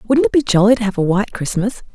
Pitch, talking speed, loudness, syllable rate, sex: 210 Hz, 280 wpm, -16 LUFS, 6.8 syllables/s, female